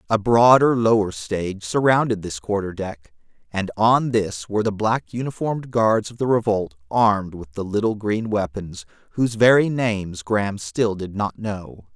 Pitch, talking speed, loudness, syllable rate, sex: 105 Hz, 165 wpm, -21 LUFS, 4.7 syllables/s, male